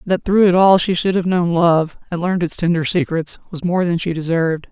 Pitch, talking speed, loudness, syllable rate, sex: 175 Hz, 240 wpm, -17 LUFS, 5.5 syllables/s, female